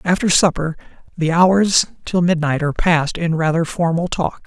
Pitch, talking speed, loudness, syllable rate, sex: 170 Hz, 160 wpm, -17 LUFS, 5.0 syllables/s, male